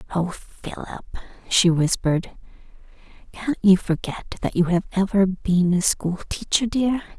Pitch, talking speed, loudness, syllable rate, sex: 190 Hz, 135 wpm, -21 LUFS, 4.5 syllables/s, female